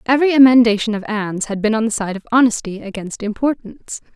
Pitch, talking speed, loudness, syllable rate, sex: 225 Hz, 190 wpm, -16 LUFS, 6.4 syllables/s, female